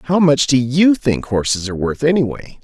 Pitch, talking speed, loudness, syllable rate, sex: 135 Hz, 205 wpm, -16 LUFS, 5.4 syllables/s, male